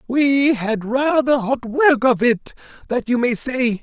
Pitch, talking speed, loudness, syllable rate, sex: 250 Hz, 175 wpm, -18 LUFS, 3.9 syllables/s, male